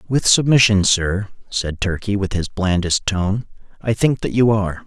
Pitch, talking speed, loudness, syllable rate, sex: 100 Hz, 175 wpm, -18 LUFS, 4.6 syllables/s, male